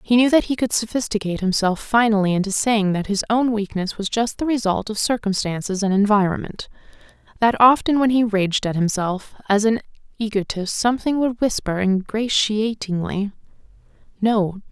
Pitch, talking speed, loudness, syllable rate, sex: 215 Hz, 150 wpm, -20 LUFS, 5.2 syllables/s, female